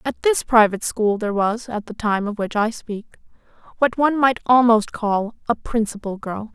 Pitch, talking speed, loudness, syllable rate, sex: 225 Hz, 195 wpm, -20 LUFS, 5.1 syllables/s, female